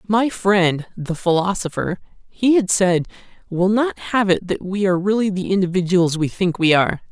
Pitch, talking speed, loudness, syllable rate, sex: 185 Hz, 175 wpm, -19 LUFS, 4.9 syllables/s, male